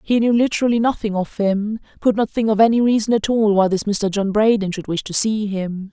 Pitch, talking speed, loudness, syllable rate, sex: 210 Hz, 235 wpm, -18 LUFS, 5.5 syllables/s, female